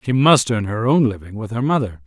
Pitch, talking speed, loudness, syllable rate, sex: 120 Hz, 260 wpm, -18 LUFS, 5.7 syllables/s, male